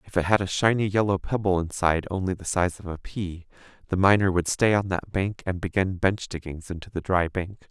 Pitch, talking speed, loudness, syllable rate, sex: 95 Hz, 225 wpm, -25 LUFS, 5.5 syllables/s, male